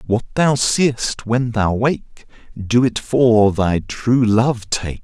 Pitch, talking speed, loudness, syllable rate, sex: 115 Hz, 155 wpm, -17 LUFS, 2.9 syllables/s, male